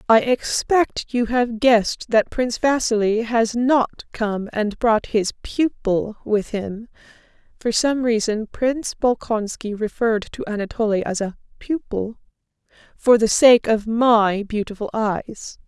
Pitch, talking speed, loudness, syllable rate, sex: 225 Hz, 135 wpm, -20 LUFS, 3.3 syllables/s, female